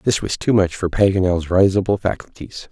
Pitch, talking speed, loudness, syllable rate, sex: 95 Hz, 175 wpm, -18 LUFS, 5.2 syllables/s, male